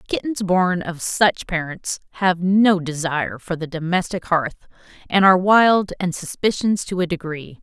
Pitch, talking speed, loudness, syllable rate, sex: 175 Hz, 155 wpm, -19 LUFS, 4.4 syllables/s, female